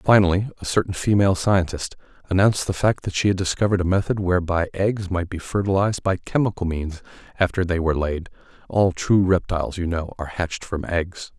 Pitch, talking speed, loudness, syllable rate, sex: 90 Hz, 180 wpm, -22 LUFS, 6.0 syllables/s, male